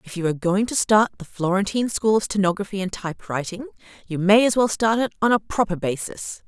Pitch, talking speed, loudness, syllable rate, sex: 200 Hz, 215 wpm, -21 LUFS, 6.1 syllables/s, female